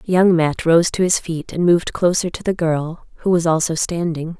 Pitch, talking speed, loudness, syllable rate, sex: 170 Hz, 220 wpm, -18 LUFS, 4.9 syllables/s, female